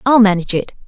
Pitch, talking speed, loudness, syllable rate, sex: 210 Hz, 205 wpm, -15 LUFS, 8.1 syllables/s, female